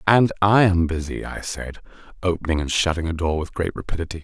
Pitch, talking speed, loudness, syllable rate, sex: 85 Hz, 185 wpm, -22 LUFS, 5.8 syllables/s, male